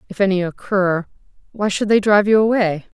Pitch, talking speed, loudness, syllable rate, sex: 195 Hz, 180 wpm, -17 LUFS, 5.7 syllables/s, female